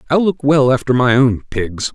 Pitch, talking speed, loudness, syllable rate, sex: 135 Hz, 215 wpm, -15 LUFS, 4.7 syllables/s, male